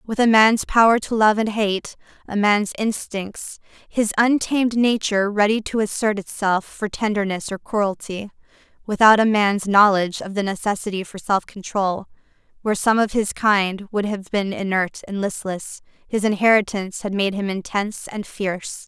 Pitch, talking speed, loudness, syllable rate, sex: 205 Hz, 160 wpm, -20 LUFS, 4.8 syllables/s, female